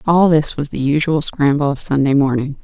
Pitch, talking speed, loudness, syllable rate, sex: 145 Hz, 205 wpm, -16 LUFS, 5.2 syllables/s, female